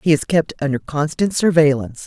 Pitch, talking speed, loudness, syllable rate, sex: 150 Hz, 175 wpm, -18 LUFS, 5.8 syllables/s, female